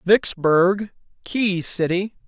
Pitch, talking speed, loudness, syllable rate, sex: 185 Hz, 80 wpm, -20 LUFS, 2.9 syllables/s, male